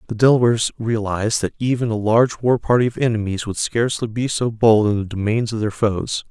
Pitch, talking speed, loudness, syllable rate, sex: 110 Hz, 210 wpm, -19 LUFS, 5.9 syllables/s, male